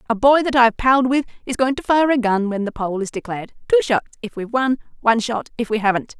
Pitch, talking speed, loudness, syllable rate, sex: 235 Hz, 260 wpm, -19 LUFS, 6.6 syllables/s, female